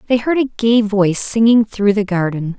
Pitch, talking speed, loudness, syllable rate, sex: 210 Hz, 210 wpm, -15 LUFS, 5.1 syllables/s, female